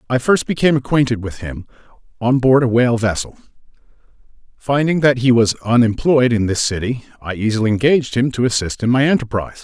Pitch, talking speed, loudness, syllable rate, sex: 120 Hz, 175 wpm, -16 LUFS, 6.2 syllables/s, male